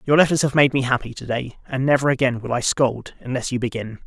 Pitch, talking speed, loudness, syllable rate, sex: 130 Hz, 250 wpm, -21 LUFS, 6.2 syllables/s, male